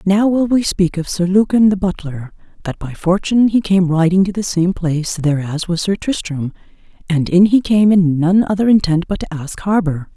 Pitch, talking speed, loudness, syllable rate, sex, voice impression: 180 Hz, 205 wpm, -15 LUFS, 5.0 syllables/s, female, feminine, middle-aged, slightly weak, slightly dark, slightly muffled, fluent, intellectual, calm, elegant, slightly strict, sharp